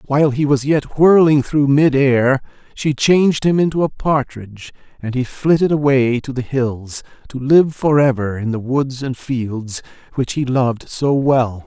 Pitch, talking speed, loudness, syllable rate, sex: 135 Hz, 170 wpm, -16 LUFS, 4.4 syllables/s, male